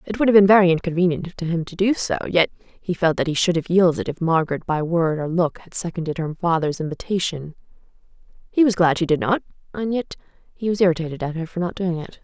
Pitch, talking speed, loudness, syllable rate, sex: 175 Hz, 230 wpm, -21 LUFS, 6.2 syllables/s, female